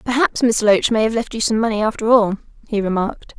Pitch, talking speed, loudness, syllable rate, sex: 220 Hz, 230 wpm, -18 LUFS, 6.1 syllables/s, female